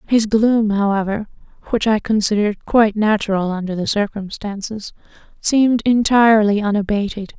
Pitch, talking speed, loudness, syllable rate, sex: 210 Hz, 115 wpm, -17 LUFS, 2.8 syllables/s, female